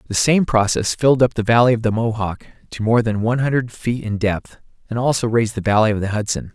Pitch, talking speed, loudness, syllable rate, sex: 115 Hz, 240 wpm, -18 LUFS, 6.2 syllables/s, male